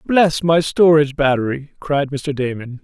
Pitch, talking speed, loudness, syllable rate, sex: 145 Hz, 150 wpm, -17 LUFS, 4.6 syllables/s, male